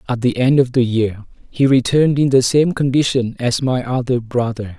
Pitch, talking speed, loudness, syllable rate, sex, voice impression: 125 Hz, 200 wpm, -16 LUFS, 5.1 syllables/s, male, masculine, adult-like, slightly weak, slightly calm, slightly friendly, slightly kind